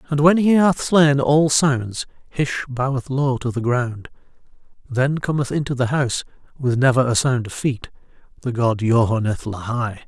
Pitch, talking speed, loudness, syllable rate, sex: 130 Hz, 165 wpm, -19 LUFS, 4.5 syllables/s, male